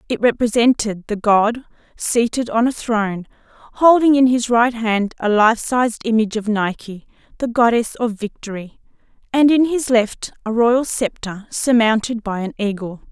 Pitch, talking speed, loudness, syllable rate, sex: 230 Hz, 155 wpm, -17 LUFS, 4.2 syllables/s, female